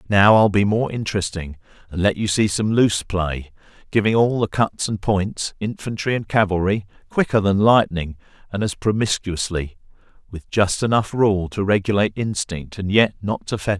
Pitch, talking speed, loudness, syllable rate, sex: 100 Hz, 165 wpm, -20 LUFS, 5.1 syllables/s, male